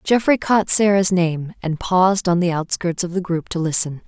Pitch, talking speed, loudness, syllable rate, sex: 180 Hz, 205 wpm, -18 LUFS, 4.9 syllables/s, female